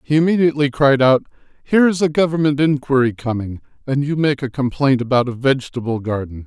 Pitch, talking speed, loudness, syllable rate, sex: 135 Hz, 175 wpm, -17 LUFS, 6.1 syllables/s, male